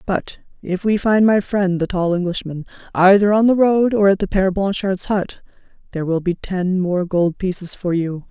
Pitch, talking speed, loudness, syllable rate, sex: 190 Hz, 200 wpm, -18 LUFS, 4.9 syllables/s, female